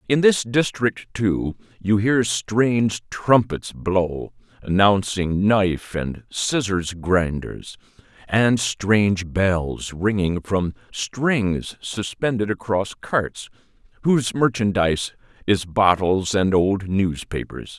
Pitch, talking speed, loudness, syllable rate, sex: 105 Hz, 100 wpm, -21 LUFS, 3.3 syllables/s, male